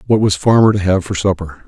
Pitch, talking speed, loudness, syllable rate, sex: 95 Hz, 250 wpm, -14 LUFS, 6.0 syllables/s, male